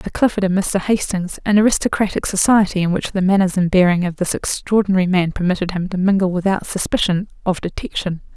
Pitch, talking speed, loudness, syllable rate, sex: 190 Hz, 185 wpm, -18 LUFS, 6.0 syllables/s, female